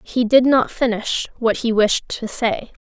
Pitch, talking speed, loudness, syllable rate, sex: 235 Hz, 190 wpm, -18 LUFS, 3.9 syllables/s, female